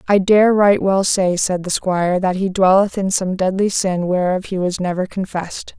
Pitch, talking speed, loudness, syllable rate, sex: 190 Hz, 205 wpm, -17 LUFS, 4.8 syllables/s, female